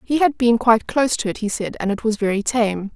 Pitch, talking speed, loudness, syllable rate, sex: 225 Hz, 285 wpm, -19 LUFS, 6.0 syllables/s, female